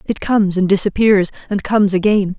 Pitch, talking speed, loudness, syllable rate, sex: 195 Hz, 175 wpm, -15 LUFS, 5.7 syllables/s, female